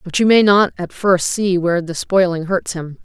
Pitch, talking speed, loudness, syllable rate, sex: 185 Hz, 235 wpm, -16 LUFS, 4.9 syllables/s, female